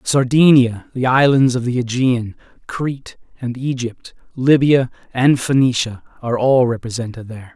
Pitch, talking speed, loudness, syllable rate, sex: 125 Hz, 125 wpm, -16 LUFS, 4.8 syllables/s, male